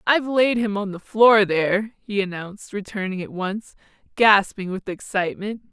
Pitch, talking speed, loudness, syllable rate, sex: 205 Hz, 155 wpm, -21 LUFS, 5.0 syllables/s, female